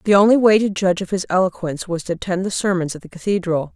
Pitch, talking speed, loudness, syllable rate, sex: 185 Hz, 255 wpm, -19 LUFS, 6.9 syllables/s, female